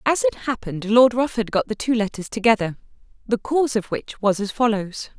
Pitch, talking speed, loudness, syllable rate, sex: 220 Hz, 195 wpm, -21 LUFS, 5.6 syllables/s, female